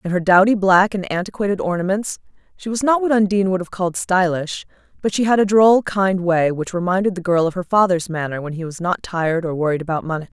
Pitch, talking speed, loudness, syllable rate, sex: 185 Hz, 230 wpm, -18 LUFS, 6.1 syllables/s, female